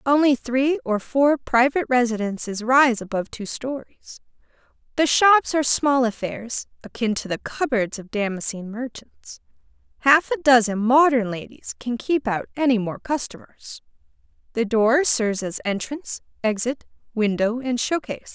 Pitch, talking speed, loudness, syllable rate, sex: 245 Hz, 135 wpm, -21 LUFS, 4.7 syllables/s, female